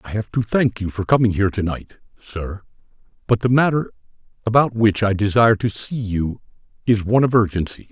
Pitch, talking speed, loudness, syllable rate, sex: 105 Hz, 190 wpm, -19 LUFS, 5.8 syllables/s, male